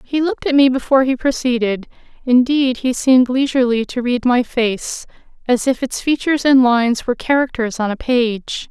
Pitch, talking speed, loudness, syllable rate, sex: 250 Hz, 180 wpm, -16 LUFS, 5.4 syllables/s, female